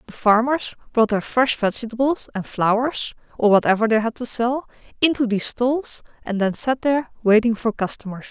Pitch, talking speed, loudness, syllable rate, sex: 235 Hz, 175 wpm, -20 LUFS, 5.3 syllables/s, female